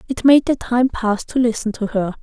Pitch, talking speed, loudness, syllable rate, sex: 235 Hz, 240 wpm, -18 LUFS, 5.0 syllables/s, female